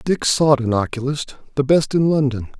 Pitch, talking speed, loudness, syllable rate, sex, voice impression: 135 Hz, 160 wpm, -18 LUFS, 4.9 syllables/s, male, masculine, middle-aged, slightly relaxed, slightly powerful, soft, slightly muffled, slightly raspy, cool, intellectual, calm, slightly mature, slightly friendly, reassuring, wild, slightly lively, kind, modest